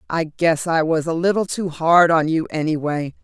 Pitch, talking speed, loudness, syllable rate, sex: 165 Hz, 205 wpm, -19 LUFS, 4.7 syllables/s, female